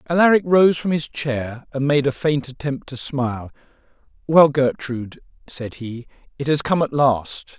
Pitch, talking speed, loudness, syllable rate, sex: 140 Hz, 165 wpm, -20 LUFS, 4.6 syllables/s, male